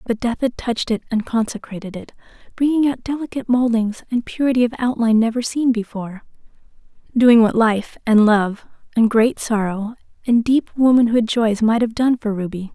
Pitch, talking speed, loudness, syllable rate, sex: 230 Hz, 165 wpm, -18 LUFS, 5.5 syllables/s, female